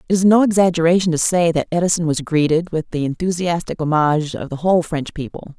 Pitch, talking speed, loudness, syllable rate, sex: 165 Hz, 205 wpm, -17 LUFS, 6.2 syllables/s, female